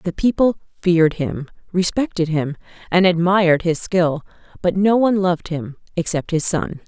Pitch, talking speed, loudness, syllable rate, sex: 175 Hz, 155 wpm, -19 LUFS, 5.0 syllables/s, female